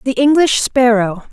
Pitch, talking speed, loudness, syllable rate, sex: 250 Hz, 135 wpm, -13 LUFS, 4.2 syllables/s, female